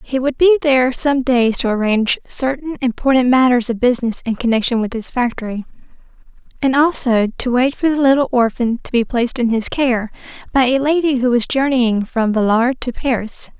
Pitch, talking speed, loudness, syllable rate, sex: 250 Hz, 185 wpm, -16 LUFS, 5.3 syllables/s, female